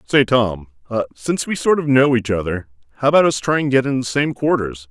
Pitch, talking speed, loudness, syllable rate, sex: 125 Hz, 230 wpm, -18 LUFS, 5.9 syllables/s, male